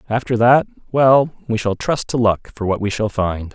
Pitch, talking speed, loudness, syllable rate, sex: 115 Hz, 205 wpm, -17 LUFS, 4.7 syllables/s, male